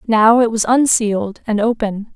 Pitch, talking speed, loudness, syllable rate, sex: 220 Hz, 165 wpm, -15 LUFS, 4.5 syllables/s, female